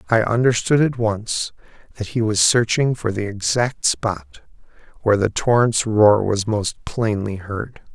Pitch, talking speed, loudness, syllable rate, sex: 110 Hz, 150 wpm, -19 LUFS, 4.1 syllables/s, male